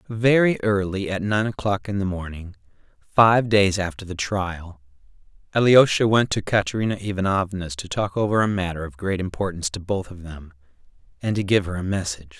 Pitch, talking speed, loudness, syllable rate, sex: 95 Hz, 175 wpm, -22 LUFS, 5.4 syllables/s, male